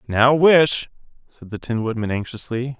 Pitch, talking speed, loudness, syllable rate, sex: 125 Hz, 150 wpm, -19 LUFS, 4.5 syllables/s, male